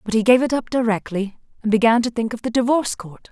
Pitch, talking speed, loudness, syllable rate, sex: 230 Hz, 255 wpm, -19 LUFS, 6.4 syllables/s, female